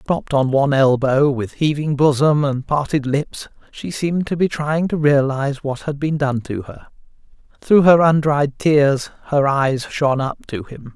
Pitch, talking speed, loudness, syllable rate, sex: 140 Hz, 180 wpm, -18 LUFS, 4.6 syllables/s, male